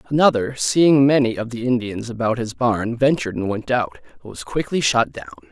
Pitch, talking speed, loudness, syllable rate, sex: 125 Hz, 195 wpm, -19 LUFS, 5.3 syllables/s, male